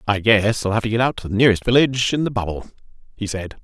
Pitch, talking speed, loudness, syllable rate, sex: 110 Hz, 265 wpm, -19 LUFS, 7.0 syllables/s, male